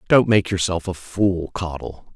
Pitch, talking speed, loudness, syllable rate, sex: 90 Hz, 165 wpm, -21 LUFS, 4.1 syllables/s, male